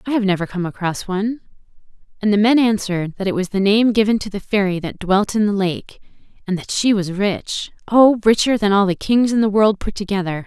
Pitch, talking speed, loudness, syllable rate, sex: 200 Hz, 225 wpm, -18 LUFS, 5.7 syllables/s, female